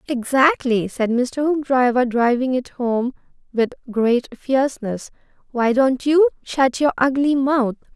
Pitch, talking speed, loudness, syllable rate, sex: 255 Hz, 130 wpm, -19 LUFS, 3.9 syllables/s, female